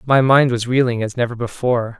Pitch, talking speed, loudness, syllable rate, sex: 120 Hz, 210 wpm, -17 LUFS, 5.8 syllables/s, male